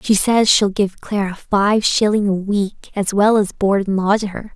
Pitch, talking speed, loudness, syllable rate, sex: 200 Hz, 210 wpm, -17 LUFS, 4.3 syllables/s, female